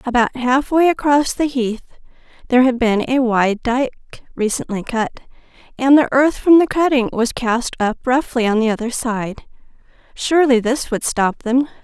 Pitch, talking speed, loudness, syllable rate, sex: 250 Hz, 160 wpm, -17 LUFS, 4.8 syllables/s, female